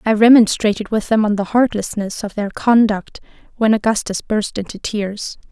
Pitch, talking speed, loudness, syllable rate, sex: 215 Hz, 165 wpm, -17 LUFS, 4.9 syllables/s, female